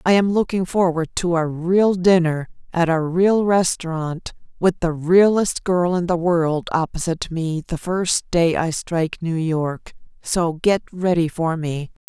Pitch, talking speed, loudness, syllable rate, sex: 170 Hz, 165 wpm, -20 LUFS, 4.0 syllables/s, female